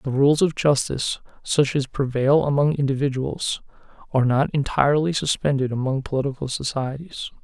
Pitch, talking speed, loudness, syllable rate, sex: 140 Hz, 130 wpm, -22 LUFS, 5.3 syllables/s, male